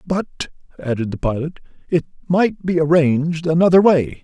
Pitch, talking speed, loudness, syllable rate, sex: 160 Hz, 140 wpm, -17 LUFS, 4.9 syllables/s, male